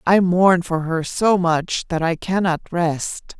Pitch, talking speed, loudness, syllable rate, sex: 175 Hz, 175 wpm, -19 LUFS, 3.6 syllables/s, female